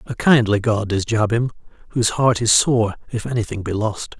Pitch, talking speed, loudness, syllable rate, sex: 110 Hz, 185 wpm, -19 LUFS, 5.2 syllables/s, male